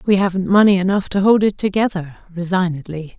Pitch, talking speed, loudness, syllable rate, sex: 190 Hz, 170 wpm, -16 LUFS, 5.9 syllables/s, female